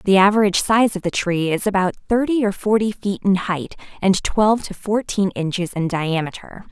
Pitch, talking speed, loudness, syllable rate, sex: 195 Hz, 190 wpm, -19 LUFS, 5.2 syllables/s, female